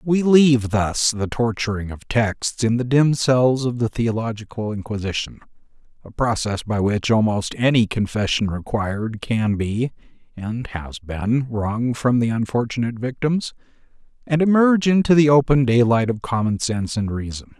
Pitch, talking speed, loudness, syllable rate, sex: 120 Hz, 150 wpm, -20 LUFS, 4.7 syllables/s, male